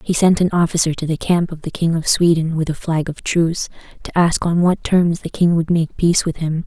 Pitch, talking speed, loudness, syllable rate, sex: 165 Hz, 260 wpm, -17 LUFS, 5.5 syllables/s, female